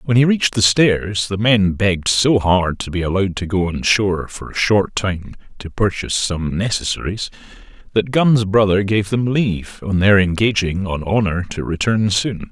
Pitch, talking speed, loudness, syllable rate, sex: 100 Hz, 185 wpm, -17 LUFS, 4.8 syllables/s, male